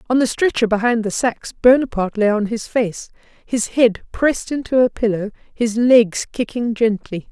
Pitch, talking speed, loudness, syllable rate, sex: 230 Hz, 170 wpm, -18 LUFS, 4.8 syllables/s, female